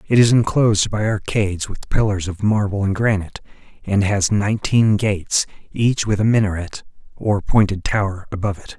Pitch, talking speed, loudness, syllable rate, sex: 100 Hz, 165 wpm, -19 LUFS, 5.4 syllables/s, male